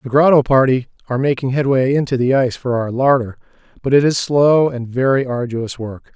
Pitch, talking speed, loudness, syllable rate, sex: 130 Hz, 195 wpm, -16 LUFS, 5.6 syllables/s, male